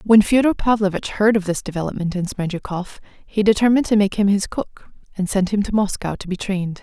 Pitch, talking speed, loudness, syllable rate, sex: 200 Hz, 210 wpm, -19 LUFS, 5.8 syllables/s, female